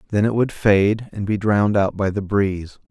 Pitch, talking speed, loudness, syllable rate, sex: 100 Hz, 230 wpm, -19 LUFS, 5.1 syllables/s, male